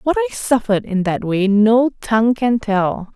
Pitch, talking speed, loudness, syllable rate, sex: 225 Hz, 190 wpm, -17 LUFS, 4.3 syllables/s, female